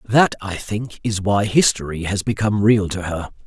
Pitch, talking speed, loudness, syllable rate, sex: 100 Hz, 190 wpm, -19 LUFS, 4.8 syllables/s, male